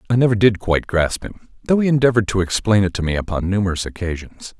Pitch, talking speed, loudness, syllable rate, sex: 100 Hz, 220 wpm, -18 LUFS, 7.0 syllables/s, male